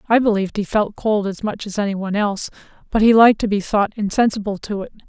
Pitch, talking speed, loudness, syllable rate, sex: 205 Hz, 235 wpm, -18 LUFS, 6.6 syllables/s, female